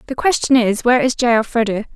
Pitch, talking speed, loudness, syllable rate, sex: 240 Hz, 215 wpm, -16 LUFS, 6.5 syllables/s, female